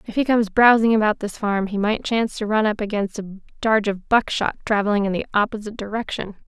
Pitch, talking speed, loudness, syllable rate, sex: 215 Hz, 215 wpm, -21 LUFS, 6.3 syllables/s, female